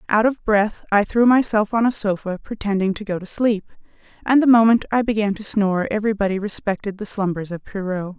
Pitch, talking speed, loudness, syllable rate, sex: 210 Hz, 200 wpm, -20 LUFS, 5.8 syllables/s, female